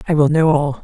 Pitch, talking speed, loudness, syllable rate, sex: 150 Hz, 290 wpm, -15 LUFS, 6.0 syllables/s, female